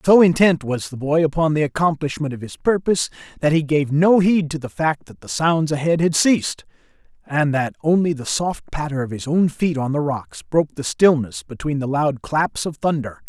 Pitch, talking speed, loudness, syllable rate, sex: 150 Hz, 210 wpm, -20 LUFS, 5.1 syllables/s, male